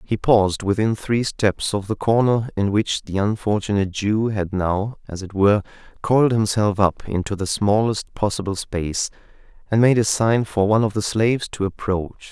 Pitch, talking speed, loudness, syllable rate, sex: 105 Hz, 180 wpm, -20 LUFS, 5.0 syllables/s, male